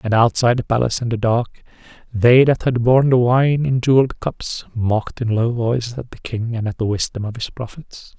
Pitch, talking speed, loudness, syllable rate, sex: 120 Hz, 220 wpm, -18 LUFS, 5.5 syllables/s, male